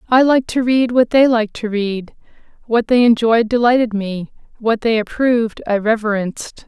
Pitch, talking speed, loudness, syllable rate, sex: 230 Hz, 170 wpm, -16 LUFS, 5.2 syllables/s, female